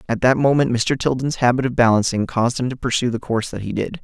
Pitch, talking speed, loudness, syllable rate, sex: 125 Hz, 255 wpm, -19 LUFS, 6.5 syllables/s, male